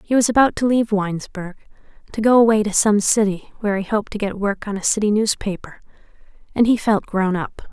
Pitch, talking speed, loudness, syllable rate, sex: 210 Hz, 210 wpm, -19 LUFS, 6.1 syllables/s, female